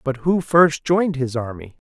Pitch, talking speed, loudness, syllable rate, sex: 145 Hz, 190 wpm, -19 LUFS, 4.7 syllables/s, male